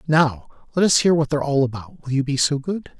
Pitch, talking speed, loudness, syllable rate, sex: 145 Hz, 260 wpm, -20 LUFS, 5.8 syllables/s, male